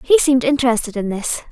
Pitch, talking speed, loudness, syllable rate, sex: 250 Hz, 200 wpm, -17 LUFS, 6.6 syllables/s, female